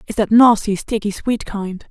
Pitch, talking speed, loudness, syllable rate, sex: 210 Hz, 190 wpm, -17 LUFS, 4.7 syllables/s, female